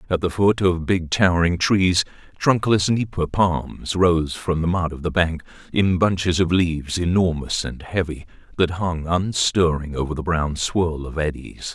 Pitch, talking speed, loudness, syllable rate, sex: 85 Hz, 170 wpm, -21 LUFS, 4.3 syllables/s, male